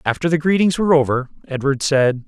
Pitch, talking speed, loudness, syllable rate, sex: 145 Hz, 185 wpm, -17 LUFS, 5.9 syllables/s, male